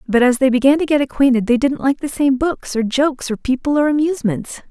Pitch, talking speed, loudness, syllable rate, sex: 265 Hz, 240 wpm, -17 LUFS, 6.0 syllables/s, female